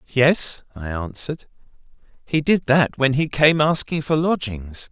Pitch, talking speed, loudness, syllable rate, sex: 140 Hz, 145 wpm, -20 LUFS, 4.2 syllables/s, male